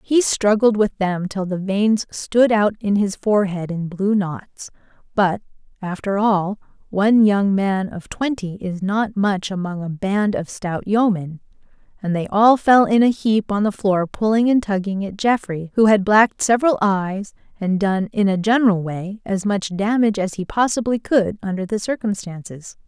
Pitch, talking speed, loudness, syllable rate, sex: 200 Hz, 180 wpm, -19 LUFS, 4.5 syllables/s, female